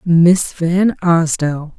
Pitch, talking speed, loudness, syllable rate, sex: 170 Hz, 100 wpm, -14 LUFS, 3.1 syllables/s, female